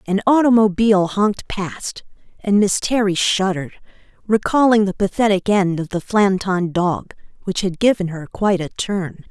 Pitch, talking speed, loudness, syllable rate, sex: 195 Hz, 150 wpm, -18 LUFS, 4.9 syllables/s, female